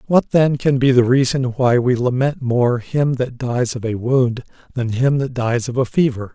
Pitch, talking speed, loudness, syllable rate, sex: 125 Hz, 215 wpm, -18 LUFS, 4.5 syllables/s, male